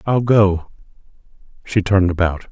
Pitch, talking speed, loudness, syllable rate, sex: 95 Hz, 120 wpm, -17 LUFS, 4.8 syllables/s, male